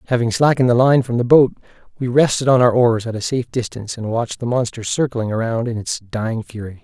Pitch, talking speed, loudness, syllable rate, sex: 120 Hz, 230 wpm, -18 LUFS, 6.3 syllables/s, male